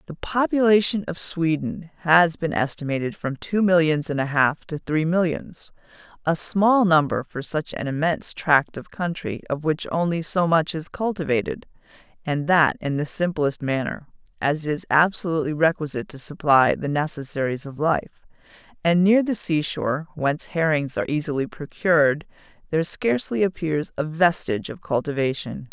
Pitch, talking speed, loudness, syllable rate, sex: 160 Hz, 145 wpm, -22 LUFS, 5.0 syllables/s, female